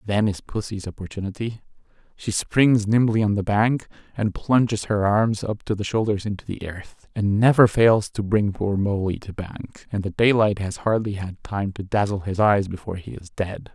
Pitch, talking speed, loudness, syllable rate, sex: 105 Hz, 195 wpm, -22 LUFS, 4.8 syllables/s, male